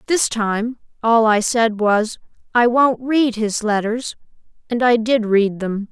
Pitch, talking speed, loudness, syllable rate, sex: 225 Hz, 160 wpm, -18 LUFS, 3.7 syllables/s, female